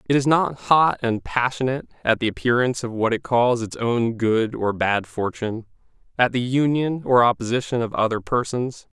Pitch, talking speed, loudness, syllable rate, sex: 120 Hz, 180 wpm, -21 LUFS, 5.1 syllables/s, male